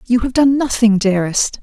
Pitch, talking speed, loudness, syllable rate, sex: 230 Hz, 185 wpm, -15 LUFS, 5.3 syllables/s, female